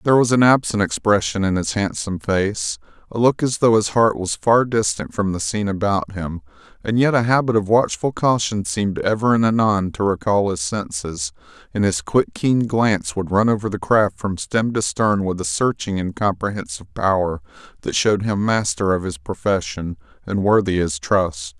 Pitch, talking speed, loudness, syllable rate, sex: 100 Hz, 190 wpm, -19 LUFS, 5.1 syllables/s, male